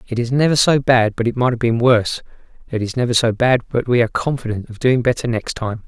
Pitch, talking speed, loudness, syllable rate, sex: 120 Hz, 255 wpm, -17 LUFS, 6.2 syllables/s, male